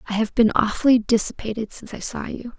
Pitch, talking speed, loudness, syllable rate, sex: 225 Hz, 210 wpm, -21 LUFS, 6.3 syllables/s, female